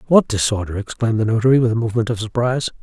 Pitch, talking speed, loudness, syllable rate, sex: 115 Hz, 210 wpm, -18 LUFS, 7.9 syllables/s, male